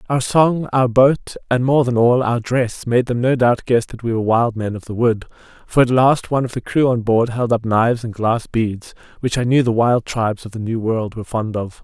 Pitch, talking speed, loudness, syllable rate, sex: 120 Hz, 260 wpm, -18 LUFS, 5.2 syllables/s, male